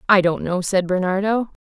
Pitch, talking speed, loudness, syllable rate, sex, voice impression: 190 Hz, 180 wpm, -20 LUFS, 5.2 syllables/s, female, feminine, adult-like, tensed, bright, clear, fluent, intellectual, calm, friendly, reassuring, elegant, lively, slightly strict